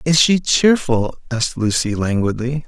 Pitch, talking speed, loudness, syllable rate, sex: 130 Hz, 135 wpm, -17 LUFS, 4.5 syllables/s, male